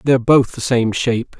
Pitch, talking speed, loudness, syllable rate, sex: 125 Hz, 215 wpm, -16 LUFS, 5.4 syllables/s, male